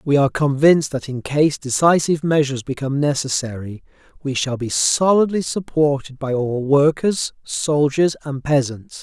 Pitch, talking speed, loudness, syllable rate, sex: 145 Hz, 140 wpm, -19 LUFS, 4.9 syllables/s, male